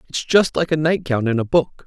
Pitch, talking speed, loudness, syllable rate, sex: 145 Hz, 290 wpm, -18 LUFS, 5.3 syllables/s, male